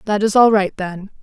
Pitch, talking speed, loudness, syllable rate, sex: 205 Hz, 245 wpm, -15 LUFS, 5.0 syllables/s, female